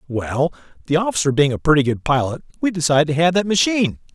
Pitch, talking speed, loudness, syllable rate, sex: 155 Hz, 205 wpm, -18 LUFS, 6.7 syllables/s, male